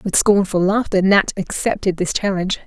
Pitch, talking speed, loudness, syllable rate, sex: 190 Hz, 155 wpm, -17 LUFS, 5.3 syllables/s, female